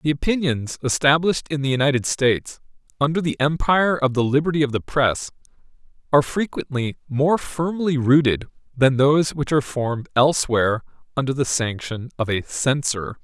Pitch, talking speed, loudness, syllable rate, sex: 140 Hz, 150 wpm, -21 LUFS, 5.4 syllables/s, male